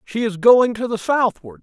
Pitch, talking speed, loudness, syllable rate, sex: 215 Hz, 220 wpm, -17 LUFS, 4.6 syllables/s, male